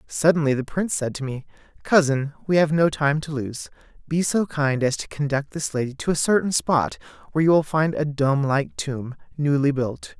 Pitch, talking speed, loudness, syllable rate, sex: 145 Hz, 205 wpm, -22 LUFS, 5.1 syllables/s, male